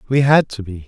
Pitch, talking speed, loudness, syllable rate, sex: 120 Hz, 275 wpm, -15 LUFS, 5.8 syllables/s, male